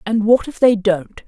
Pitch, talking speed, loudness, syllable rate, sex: 215 Hz, 235 wpm, -16 LUFS, 4.4 syllables/s, female